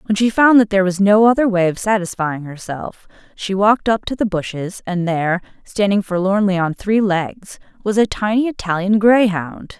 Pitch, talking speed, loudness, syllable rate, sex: 200 Hz, 185 wpm, -17 LUFS, 5.1 syllables/s, female